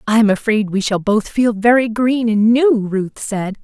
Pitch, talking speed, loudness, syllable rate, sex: 220 Hz, 215 wpm, -15 LUFS, 4.4 syllables/s, female